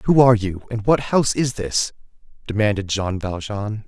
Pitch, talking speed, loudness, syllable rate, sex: 110 Hz, 170 wpm, -20 LUFS, 5.1 syllables/s, male